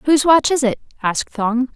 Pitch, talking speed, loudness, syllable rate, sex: 255 Hz, 205 wpm, -17 LUFS, 5.4 syllables/s, female